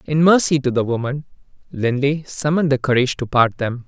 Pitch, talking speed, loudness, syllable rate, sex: 135 Hz, 185 wpm, -18 LUFS, 5.8 syllables/s, male